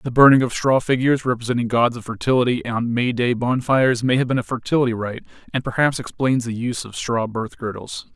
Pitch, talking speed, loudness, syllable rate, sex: 120 Hz, 205 wpm, -20 LUFS, 5.9 syllables/s, male